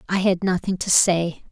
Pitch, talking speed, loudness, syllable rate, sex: 180 Hz, 195 wpm, -20 LUFS, 4.6 syllables/s, female